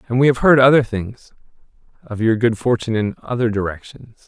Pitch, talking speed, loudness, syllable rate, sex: 115 Hz, 180 wpm, -17 LUFS, 5.6 syllables/s, male